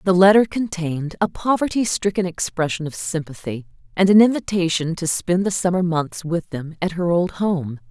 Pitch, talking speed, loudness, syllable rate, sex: 175 Hz, 175 wpm, -20 LUFS, 5.0 syllables/s, female